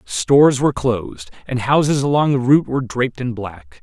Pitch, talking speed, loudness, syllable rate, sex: 125 Hz, 190 wpm, -17 LUFS, 5.6 syllables/s, male